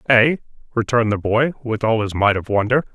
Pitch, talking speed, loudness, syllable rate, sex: 115 Hz, 205 wpm, -19 LUFS, 6.0 syllables/s, male